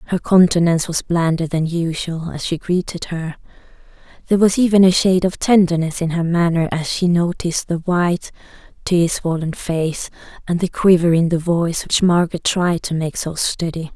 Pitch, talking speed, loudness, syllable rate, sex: 170 Hz, 175 wpm, -17 LUFS, 5.3 syllables/s, female